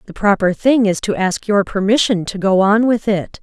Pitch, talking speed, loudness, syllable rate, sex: 205 Hz, 230 wpm, -15 LUFS, 4.9 syllables/s, female